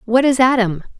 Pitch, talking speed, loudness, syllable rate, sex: 235 Hz, 180 wpm, -15 LUFS, 5.3 syllables/s, female